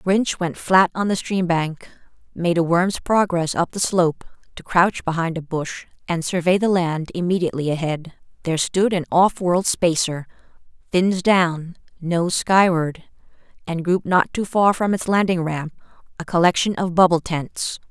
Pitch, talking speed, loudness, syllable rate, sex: 175 Hz, 165 wpm, -20 LUFS, 4.5 syllables/s, female